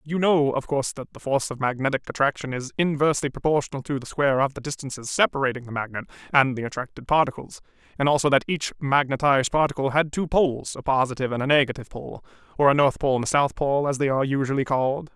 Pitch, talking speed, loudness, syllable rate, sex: 140 Hz, 215 wpm, -23 LUFS, 6.9 syllables/s, male